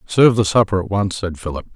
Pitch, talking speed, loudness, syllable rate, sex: 100 Hz, 240 wpm, -18 LUFS, 6.5 syllables/s, male